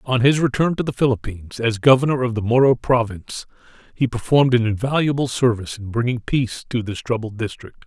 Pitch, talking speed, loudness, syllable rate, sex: 120 Hz, 185 wpm, -19 LUFS, 6.1 syllables/s, male